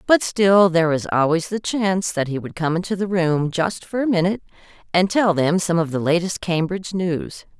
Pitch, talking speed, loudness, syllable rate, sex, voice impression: 175 Hz, 215 wpm, -20 LUFS, 5.3 syllables/s, female, slightly masculine, feminine, very gender-neutral, very adult-like, middle-aged, slightly thin, very tensed, powerful, very bright, very hard, very clear, very fluent, cool, slightly intellectual, refreshing, slightly sincere, slightly calm, slightly friendly, slightly reassuring, very unique, slightly elegant, wild, very lively, strict, intense, sharp